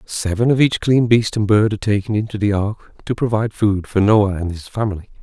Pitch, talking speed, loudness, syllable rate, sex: 105 Hz, 230 wpm, -18 LUFS, 5.7 syllables/s, male